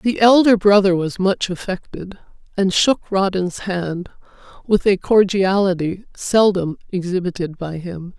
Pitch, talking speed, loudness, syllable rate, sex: 190 Hz, 125 wpm, -18 LUFS, 4.1 syllables/s, female